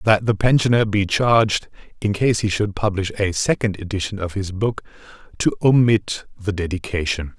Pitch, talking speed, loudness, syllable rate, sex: 100 Hz, 165 wpm, -20 LUFS, 5.0 syllables/s, male